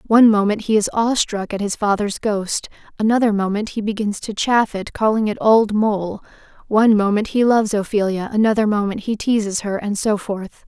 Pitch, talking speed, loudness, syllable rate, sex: 210 Hz, 190 wpm, -18 LUFS, 5.3 syllables/s, female